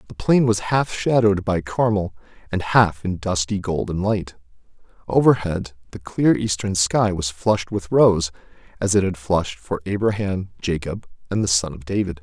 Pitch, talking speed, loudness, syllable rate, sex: 95 Hz, 165 wpm, -21 LUFS, 4.8 syllables/s, male